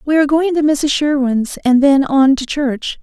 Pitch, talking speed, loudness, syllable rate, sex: 280 Hz, 220 wpm, -14 LUFS, 4.6 syllables/s, female